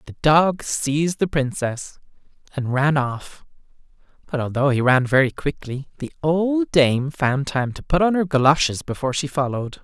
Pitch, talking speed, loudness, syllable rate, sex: 145 Hz, 165 wpm, -20 LUFS, 4.7 syllables/s, male